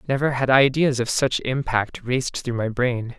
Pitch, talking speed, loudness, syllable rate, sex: 125 Hz, 190 wpm, -21 LUFS, 4.6 syllables/s, male